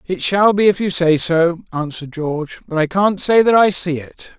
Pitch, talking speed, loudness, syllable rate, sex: 175 Hz, 235 wpm, -16 LUFS, 5.0 syllables/s, male